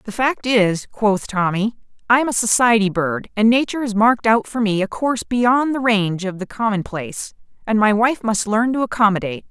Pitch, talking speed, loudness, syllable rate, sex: 220 Hz, 200 wpm, -18 LUFS, 5.5 syllables/s, female